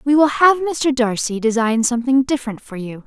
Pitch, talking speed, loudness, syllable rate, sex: 250 Hz, 195 wpm, -17 LUFS, 5.4 syllables/s, female